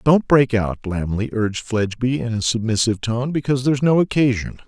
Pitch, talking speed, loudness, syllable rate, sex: 120 Hz, 180 wpm, -19 LUFS, 5.8 syllables/s, male